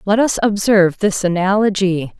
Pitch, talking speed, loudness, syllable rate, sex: 195 Hz, 135 wpm, -15 LUFS, 5.0 syllables/s, female